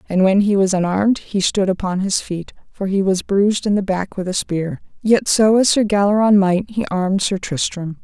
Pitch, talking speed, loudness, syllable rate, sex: 195 Hz, 225 wpm, -17 LUFS, 5.1 syllables/s, female